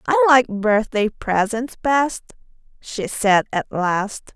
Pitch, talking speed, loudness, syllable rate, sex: 230 Hz, 125 wpm, -19 LUFS, 3.1 syllables/s, female